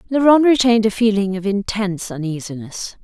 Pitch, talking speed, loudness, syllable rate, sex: 210 Hz, 140 wpm, -17 LUFS, 5.7 syllables/s, female